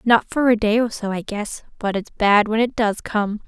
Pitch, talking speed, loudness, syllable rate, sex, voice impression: 215 Hz, 260 wpm, -20 LUFS, 4.7 syllables/s, female, very feminine, slightly young, thin, tensed, slightly powerful, very bright, slightly hard, very clear, very fluent, slightly raspy, slightly cute, cool, intellectual, very refreshing, sincere, slightly calm, very friendly, very reassuring, very unique, elegant, very wild, very sweet, lively, strict, slightly intense, slightly sharp, light